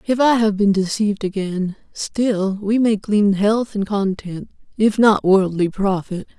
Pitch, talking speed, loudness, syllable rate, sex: 205 Hz, 160 wpm, -18 LUFS, 4.0 syllables/s, female